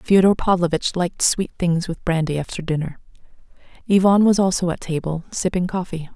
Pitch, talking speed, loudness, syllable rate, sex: 175 Hz, 155 wpm, -20 LUFS, 5.5 syllables/s, female